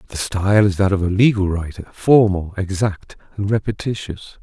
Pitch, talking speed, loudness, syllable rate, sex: 100 Hz, 150 wpm, -18 LUFS, 5.4 syllables/s, male